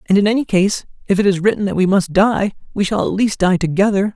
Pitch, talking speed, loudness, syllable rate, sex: 195 Hz, 260 wpm, -16 LUFS, 6.2 syllables/s, male